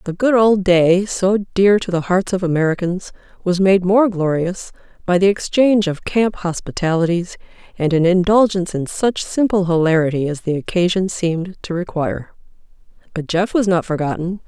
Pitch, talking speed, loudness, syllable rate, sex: 180 Hz, 160 wpm, -17 LUFS, 5.1 syllables/s, female